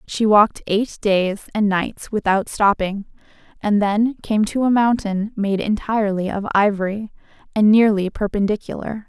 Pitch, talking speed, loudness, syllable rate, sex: 210 Hz, 140 wpm, -19 LUFS, 4.6 syllables/s, female